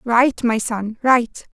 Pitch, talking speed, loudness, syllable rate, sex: 235 Hz, 155 wpm, -18 LUFS, 2.9 syllables/s, female